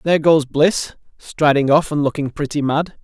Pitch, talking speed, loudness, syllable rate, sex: 150 Hz, 180 wpm, -17 LUFS, 4.8 syllables/s, male